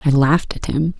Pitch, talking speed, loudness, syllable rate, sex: 150 Hz, 240 wpm, -18 LUFS, 5.7 syllables/s, female